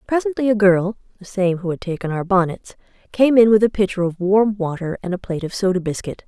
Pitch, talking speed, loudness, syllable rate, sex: 195 Hz, 230 wpm, -19 LUFS, 6.0 syllables/s, female